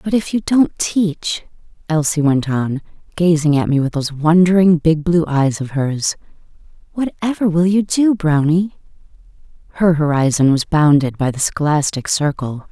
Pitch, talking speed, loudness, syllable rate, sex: 160 Hz, 150 wpm, -16 LUFS, 4.6 syllables/s, female